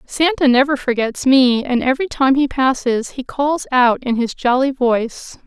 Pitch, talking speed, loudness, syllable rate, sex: 260 Hz, 175 wpm, -16 LUFS, 4.6 syllables/s, female